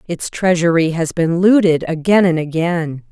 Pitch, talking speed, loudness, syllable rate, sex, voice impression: 170 Hz, 155 wpm, -15 LUFS, 4.5 syllables/s, female, feminine, adult-like, slightly intellectual, slightly calm, elegant